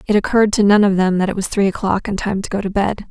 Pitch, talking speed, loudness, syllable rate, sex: 200 Hz, 330 wpm, -16 LUFS, 6.8 syllables/s, female